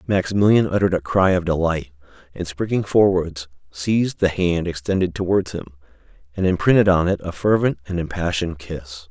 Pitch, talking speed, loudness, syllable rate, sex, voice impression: 90 Hz, 160 wpm, -20 LUFS, 5.6 syllables/s, male, masculine, adult-like, slightly thick, cool, intellectual, slightly calm